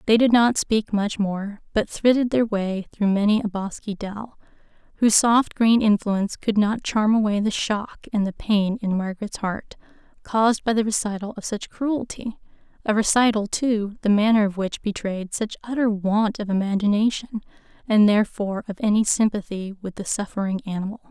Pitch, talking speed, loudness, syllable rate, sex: 210 Hz, 170 wpm, -22 LUFS, 5.1 syllables/s, female